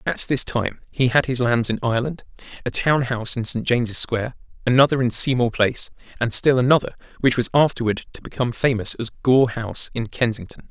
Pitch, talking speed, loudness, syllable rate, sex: 120 Hz, 190 wpm, -20 LUFS, 5.9 syllables/s, male